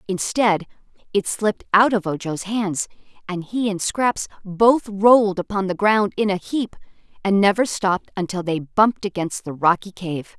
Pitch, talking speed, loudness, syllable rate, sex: 195 Hz, 170 wpm, -20 LUFS, 4.6 syllables/s, female